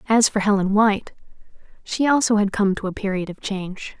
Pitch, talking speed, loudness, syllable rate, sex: 205 Hz, 195 wpm, -21 LUFS, 5.8 syllables/s, female